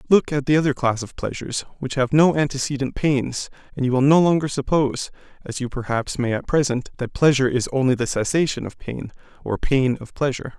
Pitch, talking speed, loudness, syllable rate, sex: 135 Hz, 205 wpm, -21 LUFS, 5.9 syllables/s, male